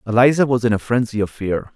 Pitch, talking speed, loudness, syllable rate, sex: 115 Hz, 240 wpm, -18 LUFS, 6.2 syllables/s, male